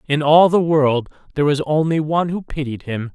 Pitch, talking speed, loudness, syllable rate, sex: 150 Hz, 210 wpm, -17 LUFS, 5.6 syllables/s, male